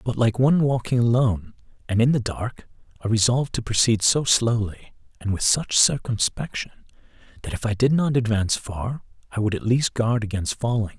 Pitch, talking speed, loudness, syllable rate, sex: 115 Hz, 180 wpm, -22 LUFS, 5.4 syllables/s, male